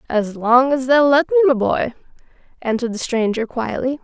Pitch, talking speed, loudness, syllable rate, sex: 255 Hz, 180 wpm, -17 LUFS, 5.3 syllables/s, female